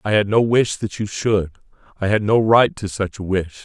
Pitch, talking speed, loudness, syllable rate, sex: 105 Hz, 245 wpm, -19 LUFS, 5.1 syllables/s, male